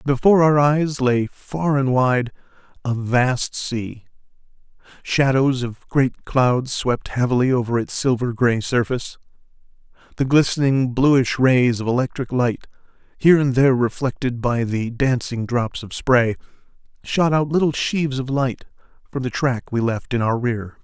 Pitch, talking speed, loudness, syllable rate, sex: 130 Hz, 150 wpm, -20 LUFS, 4.3 syllables/s, male